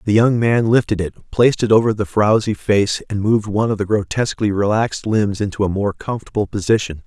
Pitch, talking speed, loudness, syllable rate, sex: 105 Hz, 205 wpm, -17 LUFS, 6.0 syllables/s, male